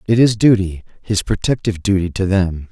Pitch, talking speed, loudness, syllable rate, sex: 100 Hz, 175 wpm, -17 LUFS, 5.5 syllables/s, male